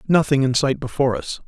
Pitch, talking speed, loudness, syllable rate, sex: 140 Hz, 205 wpm, -20 LUFS, 6.3 syllables/s, male